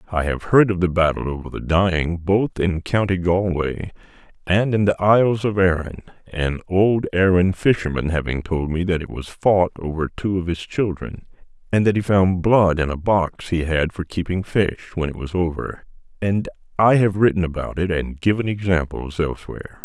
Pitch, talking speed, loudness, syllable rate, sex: 90 Hz, 190 wpm, -20 LUFS, 5.0 syllables/s, male